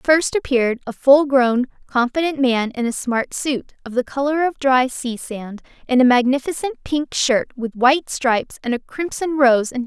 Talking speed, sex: 200 wpm, female